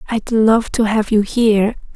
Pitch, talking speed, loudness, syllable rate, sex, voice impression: 220 Hz, 185 wpm, -15 LUFS, 4.5 syllables/s, female, feminine, slightly adult-like, soft, cute, slightly calm, friendly, kind